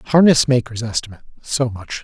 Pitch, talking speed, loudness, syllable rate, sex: 125 Hz, 150 wpm, -17 LUFS, 5.6 syllables/s, male